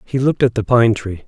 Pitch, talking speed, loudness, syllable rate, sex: 115 Hz, 280 wpm, -16 LUFS, 6.1 syllables/s, male